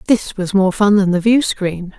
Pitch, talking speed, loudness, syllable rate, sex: 195 Hz, 210 wpm, -15 LUFS, 4.5 syllables/s, female